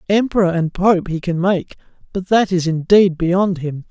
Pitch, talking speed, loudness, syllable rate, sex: 180 Hz, 185 wpm, -16 LUFS, 4.5 syllables/s, male